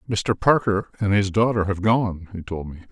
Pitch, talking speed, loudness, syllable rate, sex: 100 Hz, 205 wpm, -22 LUFS, 5.0 syllables/s, male